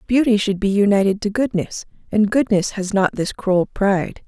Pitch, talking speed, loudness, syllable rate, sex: 205 Hz, 185 wpm, -18 LUFS, 4.9 syllables/s, female